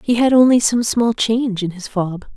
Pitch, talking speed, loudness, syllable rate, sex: 220 Hz, 230 wpm, -16 LUFS, 5.0 syllables/s, female